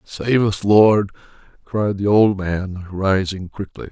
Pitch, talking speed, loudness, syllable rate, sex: 100 Hz, 140 wpm, -18 LUFS, 3.4 syllables/s, male